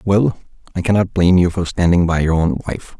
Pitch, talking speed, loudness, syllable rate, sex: 90 Hz, 220 wpm, -16 LUFS, 5.8 syllables/s, male